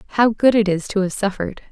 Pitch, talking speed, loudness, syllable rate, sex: 205 Hz, 245 wpm, -18 LUFS, 5.6 syllables/s, female